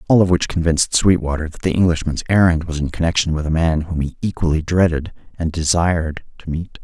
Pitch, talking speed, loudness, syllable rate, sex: 85 Hz, 200 wpm, -18 LUFS, 6.0 syllables/s, male